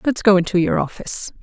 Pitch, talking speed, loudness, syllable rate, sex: 190 Hz, 210 wpm, -18 LUFS, 6.5 syllables/s, female